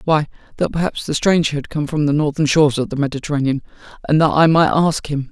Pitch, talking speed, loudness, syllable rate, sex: 150 Hz, 225 wpm, -17 LUFS, 6.2 syllables/s, male